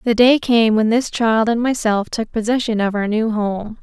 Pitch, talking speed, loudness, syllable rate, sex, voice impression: 225 Hz, 220 wpm, -17 LUFS, 4.6 syllables/s, female, feminine, slightly adult-like, slightly soft, slightly cute, calm, friendly, slightly sweet